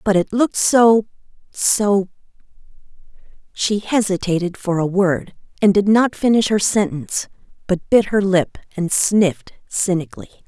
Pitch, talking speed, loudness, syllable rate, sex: 195 Hz, 125 wpm, -17 LUFS, 4.6 syllables/s, female